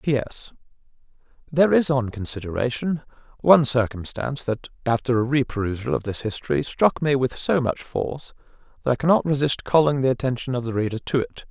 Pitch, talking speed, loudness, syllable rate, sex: 130 Hz, 165 wpm, -23 LUFS, 6.0 syllables/s, male